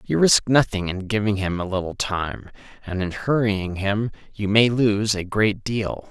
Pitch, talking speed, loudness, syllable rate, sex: 105 Hz, 185 wpm, -22 LUFS, 4.2 syllables/s, male